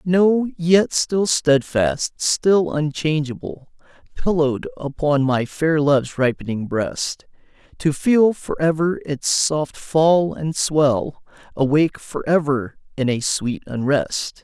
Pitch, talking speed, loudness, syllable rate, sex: 150 Hz, 115 wpm, -19 LUFS, 3.4 syllables/s, male